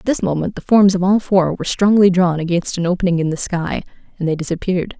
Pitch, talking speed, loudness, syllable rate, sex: 180 Hz, 240 wpm, -17 LUFS, 6.3 syllables/s, female